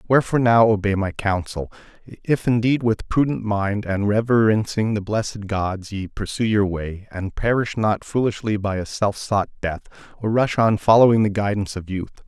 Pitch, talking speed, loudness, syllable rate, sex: 105 Hz, 175 wpm, -21 LUFS, 5.0 syllables/s, male